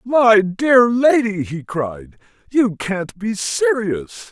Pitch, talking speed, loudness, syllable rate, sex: 195 Hz, 125 wpm, -17 LUFS, 2.9 syllables/s, male